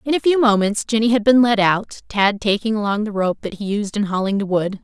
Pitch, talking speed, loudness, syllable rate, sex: 215 Hz, 260 wpm, -18 LUFS, 5.7 syllables/s, female